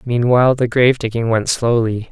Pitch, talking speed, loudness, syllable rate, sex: 120 Hz, 170 wpm, -15 LUFS, 5.5 syllables/s, male